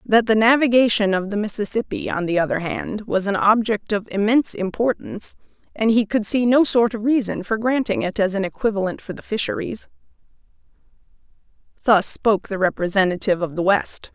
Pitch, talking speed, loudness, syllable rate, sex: 210 Hz, 170 wpm, -20 LUFS, 5.7 syllables/s, female